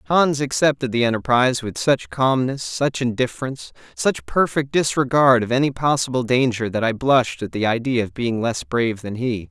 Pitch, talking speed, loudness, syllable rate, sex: 125 Hz, 175 wpm, -20 LUFS, 5.3 syllables/s, male